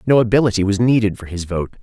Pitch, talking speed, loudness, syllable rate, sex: 105 Hz, 230 wpm, -17 LUFS, 6.7 syllables/s, male